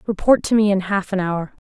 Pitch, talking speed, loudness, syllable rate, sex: 200 Hz, 250 wpm, -19 LUFS, 5.6 syllables/s, female